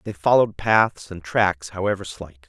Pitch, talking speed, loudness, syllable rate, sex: 95 Hz, 170 wpm, -21 LUFS, 4.9 syllables/s, male